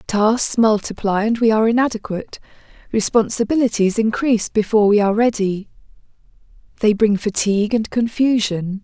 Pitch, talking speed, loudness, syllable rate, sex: 220 Hz, 115 wpm, -17 LUFS, 5.5 syllables/s, female